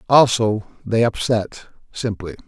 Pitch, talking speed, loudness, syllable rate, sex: 110 Hz, 75 wpm, -20 LUFS, 3.9 syllables/s, male